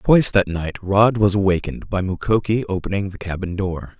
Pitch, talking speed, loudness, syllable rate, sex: 100 Hz, 180 wpm, -20 LUFS, 5.5 syllables/s, male